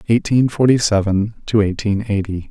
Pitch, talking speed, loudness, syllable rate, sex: 105 Hz, 145 wpm, -17 LUFS, 5.0 syllables/s, male